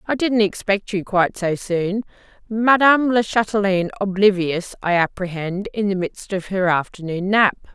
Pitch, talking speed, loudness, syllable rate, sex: 195 Hz, 155 wpm, -19 LUFS, 4.9 syllables/s, female